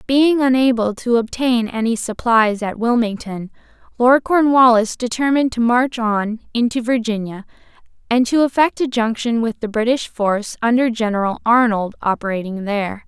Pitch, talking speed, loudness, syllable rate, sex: 235 Hz, 140 wpm, -17 LUFS, 4.9 syllables/s, female